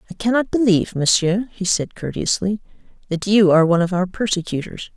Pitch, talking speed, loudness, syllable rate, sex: 190 Hz, 170 wpm, -19 LUFS, 5.9 syllables/s, female